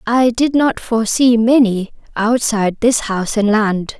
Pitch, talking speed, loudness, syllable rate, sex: 225 Hz, 150 wpm, -15 LUFS, 4.5 syllables/s, female